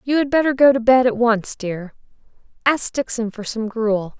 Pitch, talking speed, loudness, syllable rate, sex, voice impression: 235 Hz, 200 wpm, -18 LUFS, 4.7 syllables/s, female, feminine, adult-like, tensed, powerful, bright, soft, slightly cute, friendly, reassuring, elegant, lively, kind